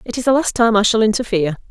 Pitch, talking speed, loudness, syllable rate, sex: 225 Hz, 280 wpm, -16 LUFS, 7.2 syllables/s, female